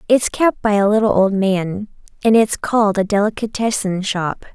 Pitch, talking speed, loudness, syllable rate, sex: 205 Hz, 170 wpm, -17 LUFS, 4.8 syllables/s, female